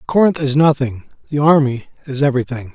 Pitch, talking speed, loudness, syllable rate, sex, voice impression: 140 Hz, 155 wpm, -16 LUFS, 6.1 syllables/s, male, very masculine, very middle-aged, slightly thick, slightly tensed, slightly powerful, slightly dark, slightly hard, slightly clear, fluent, slightly raspy, cool, intellectual, slightly refreshing, sincere, calm, mature, friendly, reassuring, unique, slightly elegant, wild, slightly sweet, lively, slightly strict, slightly intense